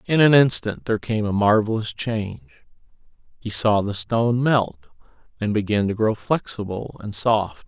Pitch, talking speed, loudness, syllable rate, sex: 110 Hz, 155 wpm, -21 LUFS, 4.9 syllables/s, male